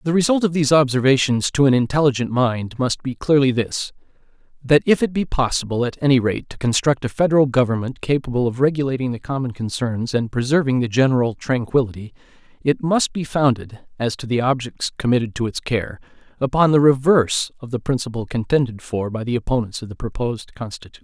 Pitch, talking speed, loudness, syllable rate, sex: 130 Hz, 185 wpm, -19 LUFS, 5.9 syllables/s, male